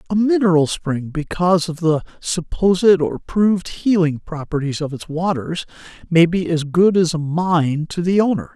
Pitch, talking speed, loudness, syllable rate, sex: 170 Hz, 170 wpm, -18 LUFS, 5.1 syllables/s, male